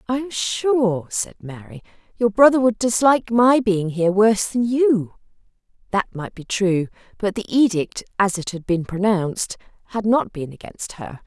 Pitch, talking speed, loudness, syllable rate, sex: 210 Hz, 170 wpm, -20 LUFS, 4.6 syllables/s, female